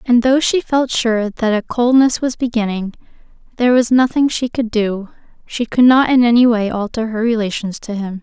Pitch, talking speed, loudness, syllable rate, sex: 230 Hz, 195 wpm, -15 LUFS, 5.0 syllables/s, female